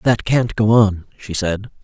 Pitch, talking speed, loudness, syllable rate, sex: 105 Hz, 195 wpm, -17 LUFS, 4.0 syllables/s, male